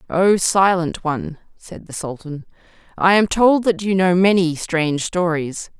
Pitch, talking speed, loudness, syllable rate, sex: 175 Hz, 155 wpm, -18 LUFS, 4.3 syllables/s, female